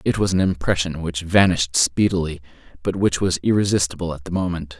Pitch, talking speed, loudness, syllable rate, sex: 85 Hz, 175 wpm, -20 LUFS, 5.9 syllables/s, male